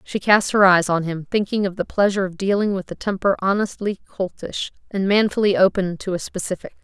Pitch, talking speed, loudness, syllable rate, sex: 195 Hz, 200 wpm, -20 LUFS, 5.7 syllables/s, female